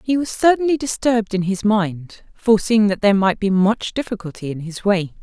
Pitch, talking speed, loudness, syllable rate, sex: 205 Hz, 195 wpm, -18 LUFS, 5.4 syllables/s, female